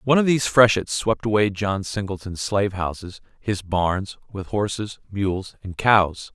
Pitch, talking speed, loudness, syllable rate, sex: 100 Hz, 160 wpm, -22 LUFS, 4.5 syllables/s, male